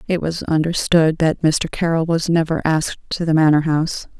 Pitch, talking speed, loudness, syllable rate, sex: 160 Hz, 185 wpm, -18 LUFS, 5.3 syllables/s, female